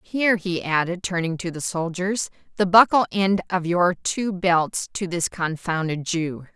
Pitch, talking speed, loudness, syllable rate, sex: 180 Hz, 165 wpm, -22 LUFS, 4.3 syllables/s, female